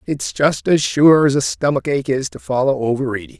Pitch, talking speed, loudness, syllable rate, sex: 120 Hz, 210 wpm, -17 LUFS, 5.2 syllables/s, male